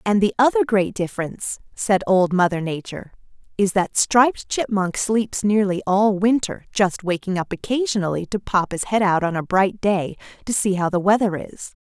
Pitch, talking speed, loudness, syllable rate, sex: 195 Hz, 185 wpm, -20 LUFS, 5.0 syllables/s, female